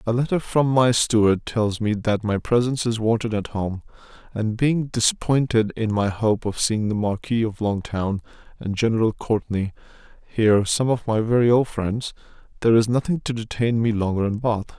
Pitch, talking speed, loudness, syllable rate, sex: 110 Hz, 185 wpm, -22 LUFS, 5.2 syllables/s, male